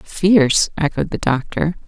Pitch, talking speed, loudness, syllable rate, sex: 160 Hz, 130 wpm, -17 LUFS, 4.1 syllables/s, female